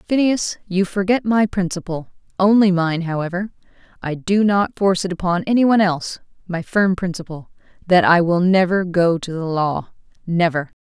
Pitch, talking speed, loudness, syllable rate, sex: 185 Hz, 145 wpm, -18 LUFS, 5.0 syllables/s, female